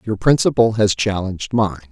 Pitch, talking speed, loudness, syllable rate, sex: 105 Hz, 155 wpm, -17 LUFS, 5.3 syllables/s, male